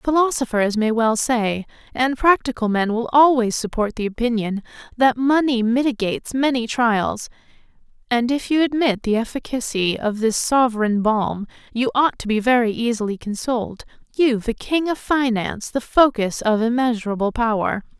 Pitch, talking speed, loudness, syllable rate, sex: 235 Hz, 145 wpm, -20 LUFS, 4.9 syllables/s, female